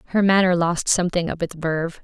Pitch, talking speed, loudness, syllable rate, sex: 175 Hz, 205 wpm, -20 LUFS, 6.3 syllables/s, female